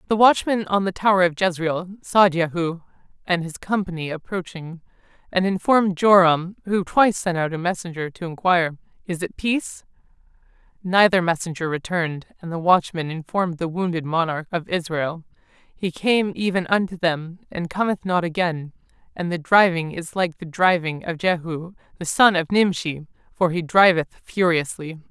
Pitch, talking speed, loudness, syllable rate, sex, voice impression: 175 Hz, 155 wpm, -21 LUFS, 5.0 syllables/s, female, slightly feminine, adult-like, intellectual, slightly calm, reassuring